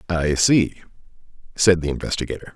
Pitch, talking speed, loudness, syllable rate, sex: 85 Hz, 115 wpm, -20 LUFS, 5.7 syllables/s, male